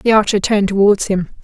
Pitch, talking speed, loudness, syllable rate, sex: 200 Hz, 210 wpm, -14 LUFS, 6.6 syllables/s, female